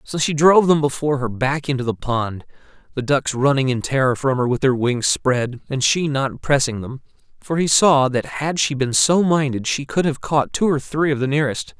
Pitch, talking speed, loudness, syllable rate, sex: 140 Hz, 230 wpm, -19 LUFS, 5.1 syllables/s, male